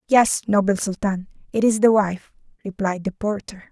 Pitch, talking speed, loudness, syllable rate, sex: 200 Hz, 160 wpm, -21 LUFS, 4.7 syllables/s, female